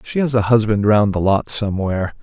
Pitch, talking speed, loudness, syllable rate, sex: 105 Hz, 215 wpm, -17 LUFS, 5.8 syllables/s, male